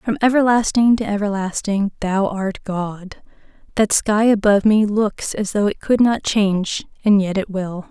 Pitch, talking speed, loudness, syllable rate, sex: 205 Hz, 165 wpm, -18 LUFS, 4.4 syllables/s, female